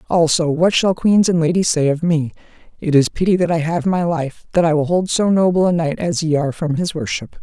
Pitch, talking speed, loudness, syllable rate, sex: 170 Hz, 250 wpm, -17 LUFS, 5.5 syllables/s, female